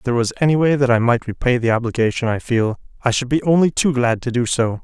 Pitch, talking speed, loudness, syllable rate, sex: 125 Hz, 275 wpm, -18 LUFS, 6.4 syllables/s, male